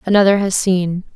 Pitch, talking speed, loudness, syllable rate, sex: 190 Hz, 155 wpm, -16 LUFS, 5.3 syllables/s, female